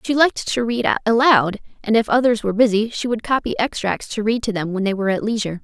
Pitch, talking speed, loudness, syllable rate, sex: 220 Hz, 245 wpm, -19 LUFS, 6.3 syllables/s, female